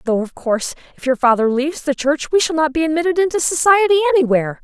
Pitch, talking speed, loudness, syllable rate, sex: 295 Hz, 220 wpm, -16 LUFS, 6.9 syllables/s, female